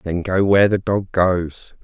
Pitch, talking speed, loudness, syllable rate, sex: 95 Hz, 195 wpm, -18 LUFS, 4.2 syllables/s, male